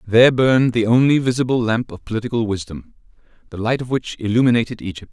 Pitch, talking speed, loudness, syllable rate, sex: 115 Hz, 175 wpm, -18 LUFS, 6.6 syllables/s, male